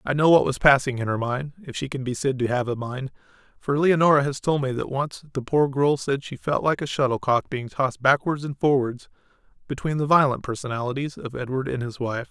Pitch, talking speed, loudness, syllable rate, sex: 135 Hz, 230 wpm, -23 LUFS, 5.7 syllables/s, male